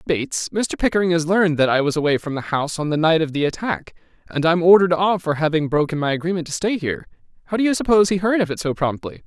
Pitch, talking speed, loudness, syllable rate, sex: 165 Hz, 260 wpm, -19 LUFS, 7.0 syllables/s, male